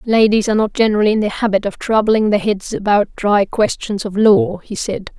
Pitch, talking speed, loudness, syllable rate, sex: 205 Hz, 210 wpm, -16 LUFS, 5.4 syllables/s, female